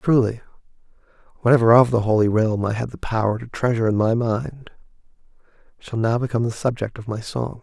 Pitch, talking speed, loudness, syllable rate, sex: 115 Hz, 180 wpm, -20 LUFS, 5.9 syllables/s, male